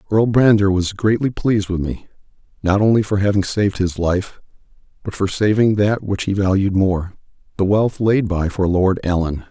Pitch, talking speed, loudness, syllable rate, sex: 100 Hz, 185 wpm, -18 LUFS, 5.0 syllables/s, male